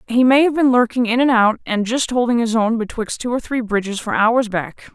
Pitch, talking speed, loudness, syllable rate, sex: 235 Hz, 255 wpm, -17 LUFS, 5.3 syllables/s, female